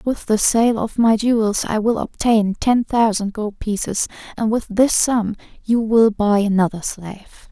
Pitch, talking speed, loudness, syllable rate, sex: 220 Hz, 175 wpm, -18 LUFS, 4.2 syllables/s, female